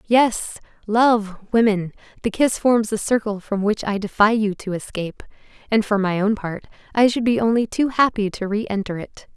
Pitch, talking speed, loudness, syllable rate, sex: 215 Hz, 185 wpm, -20 LUFS, 4.9 syllables/s, female